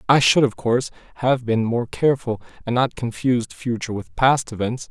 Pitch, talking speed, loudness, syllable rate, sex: 120 Hz, 185 wpm, -21 LUFS, 5.5 syllables/s, male